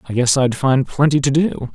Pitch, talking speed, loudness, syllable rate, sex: 135 Hz, 240 wpm, -16 LUFS, 4.9 syllables/s, male